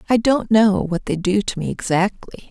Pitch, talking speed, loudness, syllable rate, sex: 200 Hz, 215 wpm, -19 LUFS, 4.8 syllables/s, female